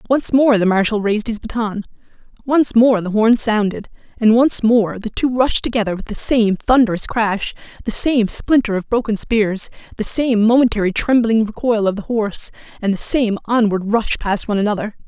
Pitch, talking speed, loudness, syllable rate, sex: 220 Hz, 185 wpm, -17 LUFS, 5.1 syllables/s, female